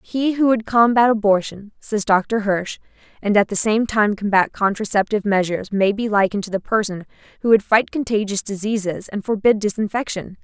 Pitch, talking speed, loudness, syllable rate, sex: 210 Hz, 175 wpm, -19 LUFS, 5.4 syllables/s, female